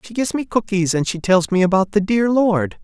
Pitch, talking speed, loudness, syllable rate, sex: 195 Hz, 255 wpm, -18 LUFS, 5.5 syllables/s, male